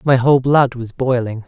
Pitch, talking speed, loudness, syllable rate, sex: 125 Hz, 205 wpm, -16 LUFS, 5.1 syllables/s, male